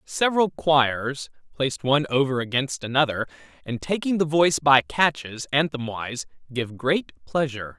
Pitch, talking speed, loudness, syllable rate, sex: 140 Hz, 140 wpm, -23 LUFS, 5.0 syllables/s, male